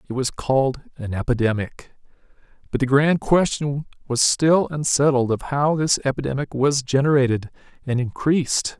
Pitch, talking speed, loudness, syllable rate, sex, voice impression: 135 Hz, 135 wpm, -21 LUFS, 4.9 syllables/s, male, masculine, slightly young, adult-like, slightly thick, slightly tensed, slightly relaxed, weak, slightly dark, slightly hard, muffled, slightly halting, slightly cool, slightly intellectual, refreshing, sincere, calm, slightly mature, slightly friendly, slightly wild, slightly sweet, kind, modest